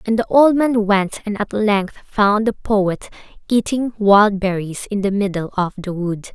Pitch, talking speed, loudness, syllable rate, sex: 205 Hz, 190 wpm, -18 LUFS, 4.2 syllables/s, female